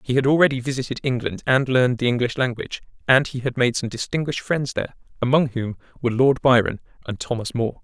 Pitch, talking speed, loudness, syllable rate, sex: 125 Hz, 200 wpm, -21 LUFS, 6.6 syllables/s, male